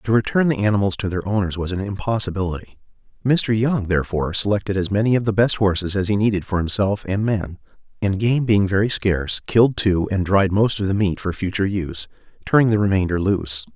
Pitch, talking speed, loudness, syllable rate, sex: 100 Hz, 205 wpm, -20 LUFS, 6.1 syllables/s, male